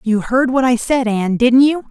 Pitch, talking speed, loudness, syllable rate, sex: 245 Hz, 250 wpm, -14 LUFS, 5.1 syllables/s, female